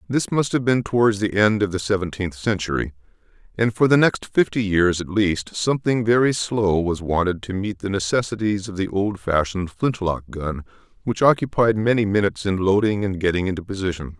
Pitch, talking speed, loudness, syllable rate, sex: 100 Hz, 180 wpm, -21 LUFS, 5.4 syllables/s, male